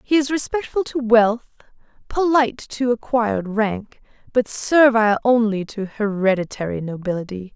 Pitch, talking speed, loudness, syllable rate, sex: 230 Hz, 120 wpm, -19 LUFS, 4.8 syllables/s, female